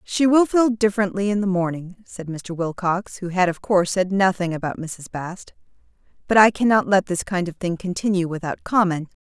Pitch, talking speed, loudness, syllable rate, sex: 190 Hz, 195 wpm, -21 LUFS, 5.3 syllables/s, female